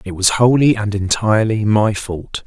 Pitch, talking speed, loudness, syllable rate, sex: 105 Hz, 170 wpm, -16 LUFS, 4.6 syllables/s, male